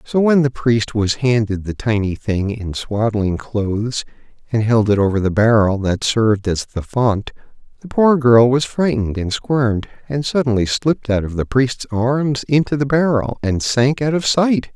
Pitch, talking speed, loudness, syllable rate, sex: 120 Hz, 185 wpm, -17 LUFS, 4.6 syllables/s, male